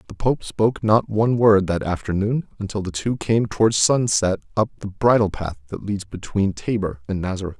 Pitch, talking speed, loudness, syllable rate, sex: 105 Hz, 190 wpm, -21 LUFS, 5.3 syllables/s, male